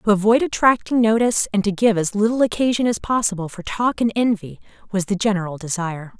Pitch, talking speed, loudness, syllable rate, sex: 210 Hz, 195 wpm, -19 LUFS, 6.1 syllables/s, female